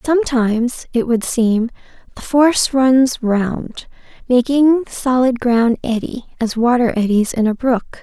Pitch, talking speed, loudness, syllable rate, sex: 245 Hz, 140 wpm, -16 LUFS, 4.3 syllables/s, female